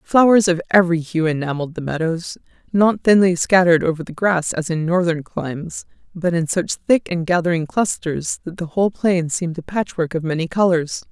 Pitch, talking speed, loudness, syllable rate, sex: 170 Hz, 185 wpm, -19 LUFS, 5.4 syllables/s, female